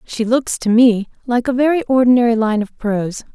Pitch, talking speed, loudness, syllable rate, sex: 240 Hz, 200 wpm, -16 LUFS, 5.3 syllables/s, female